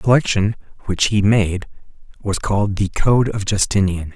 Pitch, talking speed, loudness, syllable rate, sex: 100 Hz, 160 wpm, -18 LUFS, 4.8 syllables/s, male